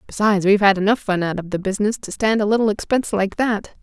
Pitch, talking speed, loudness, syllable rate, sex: 205 Hz, 250 wpm, -19 LUFS, 6.9 syllables/s, female